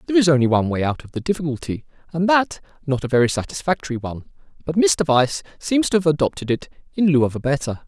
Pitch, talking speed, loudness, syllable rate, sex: 150 Hz, 220 wpm, -20 LUFS, 6.8 syllables/s, male